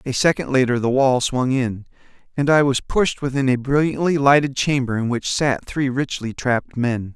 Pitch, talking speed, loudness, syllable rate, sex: 130 Hz, 195 wpm, -19 LUFS, 4.9 syllables/s, male